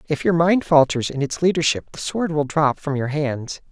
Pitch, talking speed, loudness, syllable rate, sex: 150 Hz, 225 wpm, -20 LUFS, 4.9 syllables/s, male